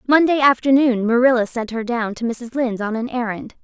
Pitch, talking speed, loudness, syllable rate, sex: 240 Hz, 200 wpm, -18 LUFS, 5.6 syllables/s, female